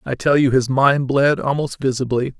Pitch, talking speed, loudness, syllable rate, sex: 135 Hz, 200 wpm, -17 LUFS, 4.9 syllables/s, male